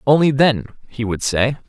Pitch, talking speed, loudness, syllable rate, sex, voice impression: 130 Hz, 180 wpm, -18 LUFS, 4.5 syllables/s, male, masculine, slightly young, slightly adult-like, slightly thick, slightly tensed, slightly weak, slightly bright, hard, clear, slightly fluent, slightly cool, intellectual, refreshing, sincere, calm, slightly mature, friendly, reassuring, slightly unique, elegant, slightly sweet, slightly lively, kind, slightly modest